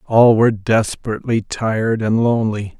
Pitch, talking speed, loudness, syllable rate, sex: 110 Hz, 130 wpm, -17 LUFS, 5.3 syllables/s, male